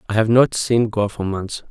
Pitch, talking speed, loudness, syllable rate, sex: 110 Hz, 245 wpm, -18 LUFS, 4.7 syllables/s, male